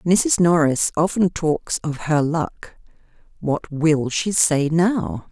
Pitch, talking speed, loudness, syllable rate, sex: 160 Hz, 135 wpm, -20 LUFS, 3.1 syllables/s, female